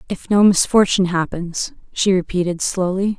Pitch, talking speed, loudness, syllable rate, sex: 185 Hz, 130 wpm, -18 LUFS, 5.0 syllables/s, female